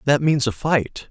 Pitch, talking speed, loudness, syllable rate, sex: 135 Hz, 215 wpm, -20 LUFS, 4.2 syllables/s, male